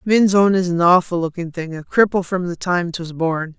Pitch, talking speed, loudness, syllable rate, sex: 175 Hz, 215 wpm, -18 LUFS, 4.9 syllables/s, female